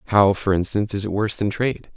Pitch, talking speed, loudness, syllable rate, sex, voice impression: 105 Hz, 245 wpm, -21 LUFS, 7.1 syllables/s, male, masculine, adult-like, thick, tensed, powerful, hard, fluent, raspy, cool, calm, mature, reassuring, wild, slightly lively, strict